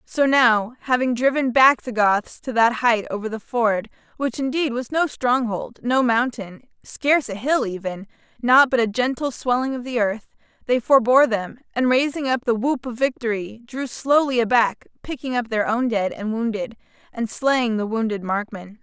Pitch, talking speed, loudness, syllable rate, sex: 240 Hz, 180 wpm, -21 LUFS, 4.8 syllables/s, female